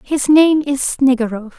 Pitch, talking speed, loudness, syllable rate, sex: 270 Hz, 150 wpm, -14 LUFS, 4.0 syllables/s, female